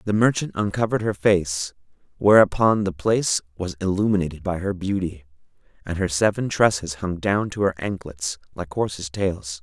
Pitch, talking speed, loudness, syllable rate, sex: 95 Hz, 155 wpm, -22 LUFS, 4.9 syllables/s, male